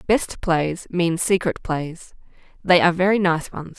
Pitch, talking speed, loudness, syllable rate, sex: 175 Hz, 160 wpm, -20 LUFS, 4.1 syllables/s, female